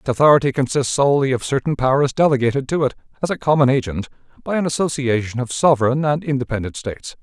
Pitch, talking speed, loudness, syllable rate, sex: 135 Hz, 185 wpm, -18 LUFS, 6.7 syllables/s, male